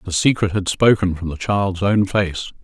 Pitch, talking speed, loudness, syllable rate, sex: 95 Hz, 205 wpm, -18 LUFS, 4.5 syllables/s, male